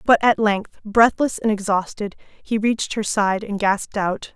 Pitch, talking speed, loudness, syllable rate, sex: 210 Hz, 180 wpm, -20 LUFS, 4.4 syllables/s, female